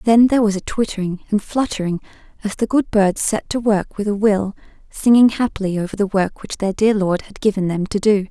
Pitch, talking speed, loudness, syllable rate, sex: 205 Hz, 225 wpm, -18 LUFS, 5.5 syllables/s, female